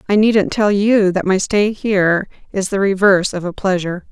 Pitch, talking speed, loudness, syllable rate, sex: 195 Hz, 220 wpm, -16 LUFS, 5.4 syllables/s, female